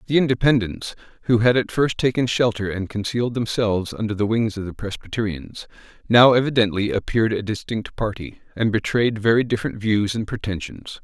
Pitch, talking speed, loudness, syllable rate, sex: 110 Hz, 165 wpm, -21 LUFS, 5.6 syllables/s, male